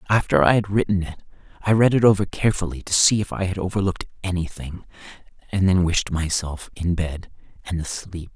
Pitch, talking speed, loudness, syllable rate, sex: 95 Hz, 180 wpm, -21 LUFS, 5.8 syllables/s, male